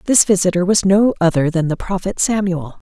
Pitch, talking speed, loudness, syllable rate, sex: 185 Hz, 190 wpm, -16 LUFS, 5.4 syllables/s, female